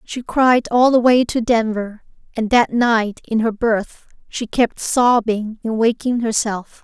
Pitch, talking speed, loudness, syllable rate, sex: 230 Hz, 165 wpm, -17 LUFS, 3.7 syllables/s, female